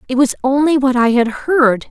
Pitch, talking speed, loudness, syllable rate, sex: 260 Hz, 220 wpm, -14 LUFS, 4.9 syllables/s, female